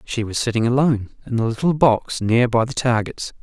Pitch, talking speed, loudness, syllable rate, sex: 120 Hz, 210 wpm, -19 LUFS, 5.5 syllables/s, male